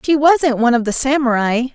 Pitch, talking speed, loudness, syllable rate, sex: 260 Hz, 205 wpm, -15 LUFS, 5.5 syllables/s, female